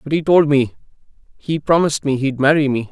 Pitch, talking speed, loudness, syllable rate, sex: 145 Hz, 185 wpm, -16 LUFS, 5.7 syllables/s, male